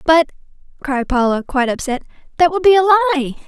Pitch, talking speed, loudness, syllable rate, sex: 305 Hz, 175 wpm, -16 LUFS, 7.1 syllables/s, female